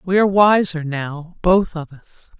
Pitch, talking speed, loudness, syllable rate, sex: 175 Hz, 175 wpm, -17 LUFS, 4.1 syllables/s, female